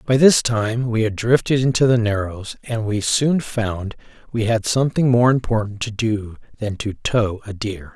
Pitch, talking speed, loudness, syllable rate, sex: 115 Hz, 190 wpm, -19 LUFS, 4.5 syllables/s, male